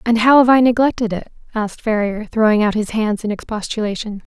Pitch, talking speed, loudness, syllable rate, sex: 220 Hz, 195 wpm, -17 LUFS, 5.9 syllables/s, female